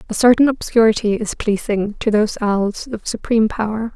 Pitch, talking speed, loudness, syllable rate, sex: 220 Hz, 165 wpm, -17 LUFS, 5.4 syllables/s, female